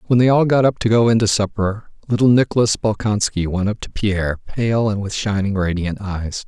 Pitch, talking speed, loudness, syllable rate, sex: 105 Hz, 215 wpm, -18 LUFS, 5.4 syllables/s, male